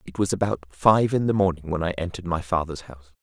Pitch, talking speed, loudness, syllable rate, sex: 90 Hz, 240 wpm, -24 LUFS, 6.6 syllables/s, male